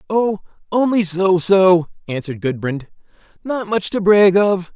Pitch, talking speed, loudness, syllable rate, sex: 190 Hz, 140 wpm, -17 LUFS, 4.2 syllables/s, male